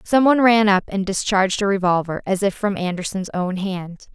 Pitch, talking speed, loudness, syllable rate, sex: 195 Hz, 205 wpm, -19 LUFS, 5.4 syllables/s, female